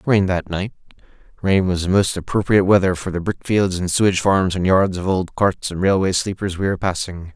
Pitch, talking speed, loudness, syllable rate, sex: 95 Hz, 220 wpm, -19 LUFS, 5.9 syllables/s, male